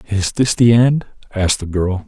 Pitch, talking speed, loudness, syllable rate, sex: 105 Hz, 205 wpm, -16 LUFS, 4.8 syllables/s, male